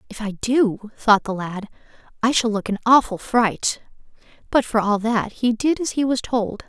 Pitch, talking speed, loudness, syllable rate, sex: 225 Hz, 200 wpm, -20 LUFS, 4.5 syllables/s, female